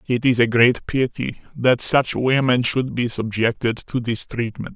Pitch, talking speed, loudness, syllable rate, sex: 120 Hz, 175 wpm, -20 LUFS, 4.2 syllables/s, female